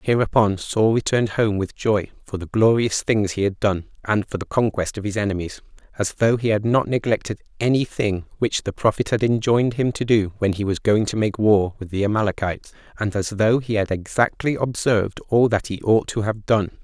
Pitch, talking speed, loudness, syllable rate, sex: 105 Hz, 215 wpm, -21 LUFS, 5.4 syllables/s, male